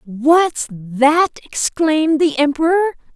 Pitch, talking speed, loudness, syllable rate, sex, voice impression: 300 Hz, 95 wpm, -16 LUFS, 3.6 syllables/s, female, feminine, middle-aged, tensed, powerful, raspy, intellectual, slightly friendly, lively, intense